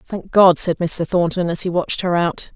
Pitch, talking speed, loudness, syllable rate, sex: 175 Hz, 235 wpm, -17 LUFS, 4.9 syllables/s, female